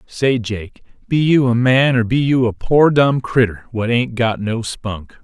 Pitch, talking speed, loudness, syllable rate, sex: 120 Hz, 205 wpm, -16 LUFS, 4.0 syllables/s, male